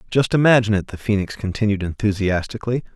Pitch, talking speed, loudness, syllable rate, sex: 105 Hz, 140 wpm, -20 LUFS, 6.8 syllables/s, male